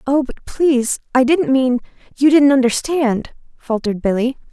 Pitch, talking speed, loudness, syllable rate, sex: 260 Hz, 135 wpm, -16 LUFS, 4.8 syllables/s, female